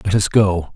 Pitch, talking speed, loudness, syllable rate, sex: 95 Hz, 235 wpm, -16 LUFS, 5.2 syllables/s, male